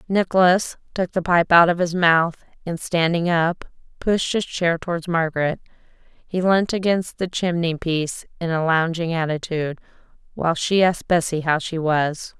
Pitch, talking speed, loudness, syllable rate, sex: 170 Hz, 160 wpm, -20 LUFS, 4.8 syllables/s, female